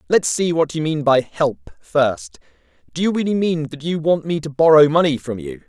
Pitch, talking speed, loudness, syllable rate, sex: 145 Hz, 220 wpm, -18 LUFS, 4.9 syllables/s, male